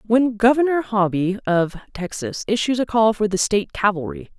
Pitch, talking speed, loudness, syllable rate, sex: 210 Hz, 165 wpm, -20 LUFS, 5.2 syllables/s, female